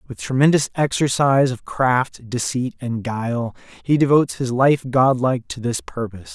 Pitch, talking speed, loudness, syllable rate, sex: 125 Hz, 150 wpm, -19 LUFS, 5.0 syllables/s, male